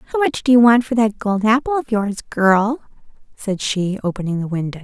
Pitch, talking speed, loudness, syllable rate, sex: 215 Hz, 210 wpm, -17 LUFS, 5.5 syllables/s, female